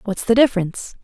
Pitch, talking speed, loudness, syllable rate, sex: 210 Hz, 175 wpm, -18 LUFS, 7.1 syllables/s, female